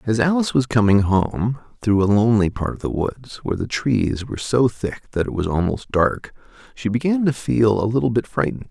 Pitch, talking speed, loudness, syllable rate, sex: 115 Hz, 215 wpm, -20 LUFS, 5.5 syllables/s, male